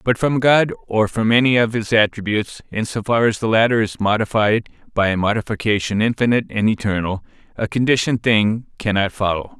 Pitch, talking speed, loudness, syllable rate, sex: 110 Hz, 175 wpm, -18 LUFS, 5.6 syllables/s, male